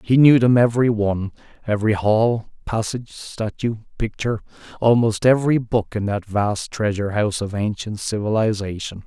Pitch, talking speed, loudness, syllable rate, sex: 110 Hz, 140 wpm, -20 LUFS, 5.4 syllables/s, male